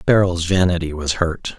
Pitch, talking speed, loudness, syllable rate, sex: 85 Hz, 150 wpm, -19 LUFS, 4.8 syllables/s, male